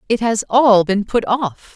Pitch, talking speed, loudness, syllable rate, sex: 215 Hz, 205 wpm, -16 LUFS, 3.9 syllables/s, female